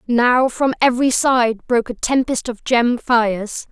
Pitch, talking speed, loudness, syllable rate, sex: 240 Hz, 160 wpm, -17 LUFS, 4.3 syllables/s, female